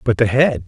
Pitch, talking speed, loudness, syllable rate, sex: 115 Hz, 270 wpm, -16 LUFS, 5.3 syllables/s, male